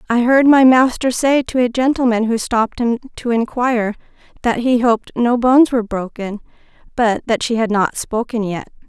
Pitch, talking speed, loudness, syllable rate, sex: 235 Hz, 180 wpm, -16 LUFS, 5.2 syllables/s, female